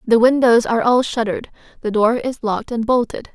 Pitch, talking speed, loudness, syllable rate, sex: 235 Hz, 195 wpm, -17 LUFS, 5.9 syllables/s, female